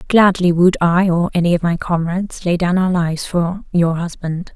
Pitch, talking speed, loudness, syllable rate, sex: 175 Hz, 200 wpm, -16 LUFS, 5.0 syllables/s, female